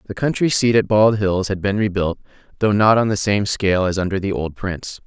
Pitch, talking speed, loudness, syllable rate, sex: 100 Hz, 235 wpm, -18 LUFS, 5.6 syllables/s, male